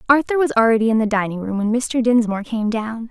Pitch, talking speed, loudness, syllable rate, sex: 230 Hz, 230 wpm, -18 LUFS, 6.3 syllables/s, female